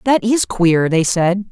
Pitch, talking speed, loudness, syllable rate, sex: 195 Hz, 200 wpm, -15 LUFS, 3.6 syllables/s, female